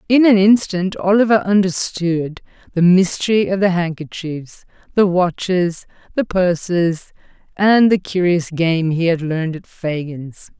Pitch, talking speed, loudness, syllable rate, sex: 180 Hz, 130 wpm, -17 LUFS, 4.2 syllables/s, female